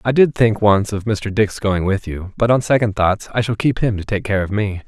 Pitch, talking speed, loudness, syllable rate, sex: 105 Hz, 285 wpm, -18 LUFS, 5.1 syllables/s, male